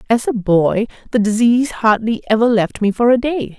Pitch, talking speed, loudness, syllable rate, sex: 225 Hz, 200 wpm, -16 LUFS, 5.2 syllables/s, female